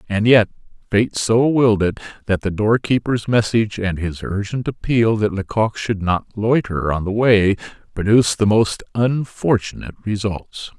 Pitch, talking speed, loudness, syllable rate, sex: 105 Hz, 150 wpm, -18 LUFS, 4.5 syllables/s, male